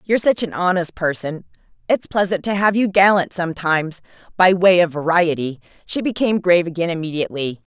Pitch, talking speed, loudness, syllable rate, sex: 180 Hz, 165 wpm, -18 LUFS, 6.0 syllables/s, female